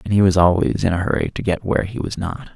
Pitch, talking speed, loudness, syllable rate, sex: 95 Hz, 305 wpm, -19 LUFS, 6.6 syllables/s, male